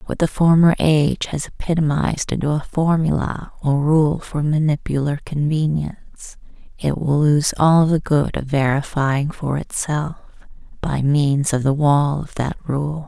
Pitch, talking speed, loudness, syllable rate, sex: 150 Hz, 145 wpm, -19 LUFS, 4.3 syllables/s, female